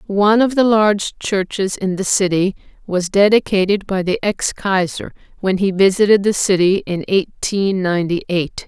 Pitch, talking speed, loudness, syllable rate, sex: 195 Hz, 160 wpm, -16 LUFS, 4.7 syllables/s, female